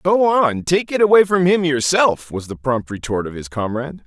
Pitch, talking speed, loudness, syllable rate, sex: 150 Hz, 220 wpm, -17 LUFS, 5.1 syllables/s, male